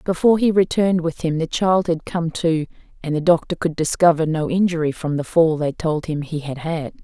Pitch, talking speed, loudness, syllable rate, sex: 165 Hz, 220 wpm, -20 LUFS, 5.4 syllables/s, female